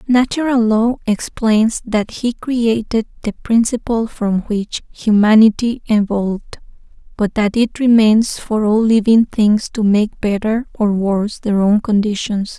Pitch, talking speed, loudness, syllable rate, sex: 220 Hz, 135 wpm, -15 LUFS, 4.0 syllables/s, female